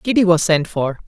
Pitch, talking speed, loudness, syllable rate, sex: 170 Hz, 225 wpm, -16 LUFS, 5.4 syllables/s, male